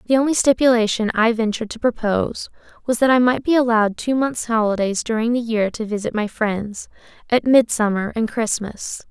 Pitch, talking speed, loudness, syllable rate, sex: 225 Hz, 180 wpm, -19 LUFS, 5.5 syllables/s, female